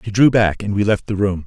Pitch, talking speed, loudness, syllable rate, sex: 100 Hz, 330 wpm, -17 LUFS, 5.8 syllables/s, male